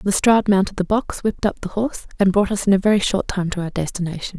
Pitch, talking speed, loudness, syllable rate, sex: 195 Hz, 260 wpm, -20 LUFS, 6.7 syllables/s, female